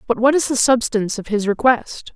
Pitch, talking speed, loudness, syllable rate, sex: 235 Hz, 225 wpm, -17 LUFS, 5.5 syllables/s, female